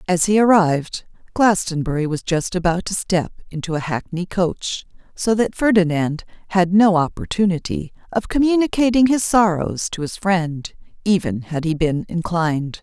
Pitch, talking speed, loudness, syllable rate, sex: 185 Hz, 145 wpm, -19 LUFS, 4.7 syllables/s, female